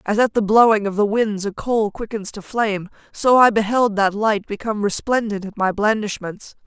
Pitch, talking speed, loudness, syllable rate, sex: 210 Hz, 200 wpm, -19 LUFS, 5.1 syllables/s, female